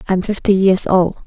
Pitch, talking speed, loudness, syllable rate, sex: 190 Hz, 190 wpm, -15 LUFS, 5.0 syllables/s, female